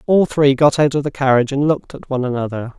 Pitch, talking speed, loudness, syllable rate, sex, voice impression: 135 Hz, 260 wpm, -17 LUFS, 6.8 syllables/s, male, masculine, adult-like, tensed, soft, halting, intellectual, friendly, reassuring, slightly wild, kind, slightly modest